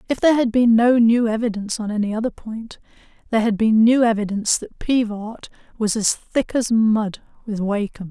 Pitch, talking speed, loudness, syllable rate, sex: 225 Hz, 185 wpm, -19 LUFS, 5.4 syllables/s, female